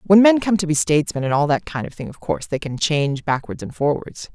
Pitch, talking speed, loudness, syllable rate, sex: 160 Hz, 275 wpm, -20 LUFS, 6.2 syllables/s, female